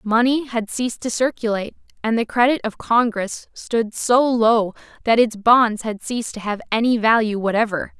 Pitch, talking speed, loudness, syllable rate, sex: 230 Hz, 175 wpm, -19 LUFS, 4.9 syllables/s, female